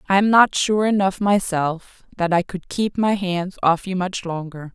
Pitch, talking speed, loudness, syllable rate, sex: 185 Hz, 175 wpm, -20 LUFS, 4.1 syllables/s, female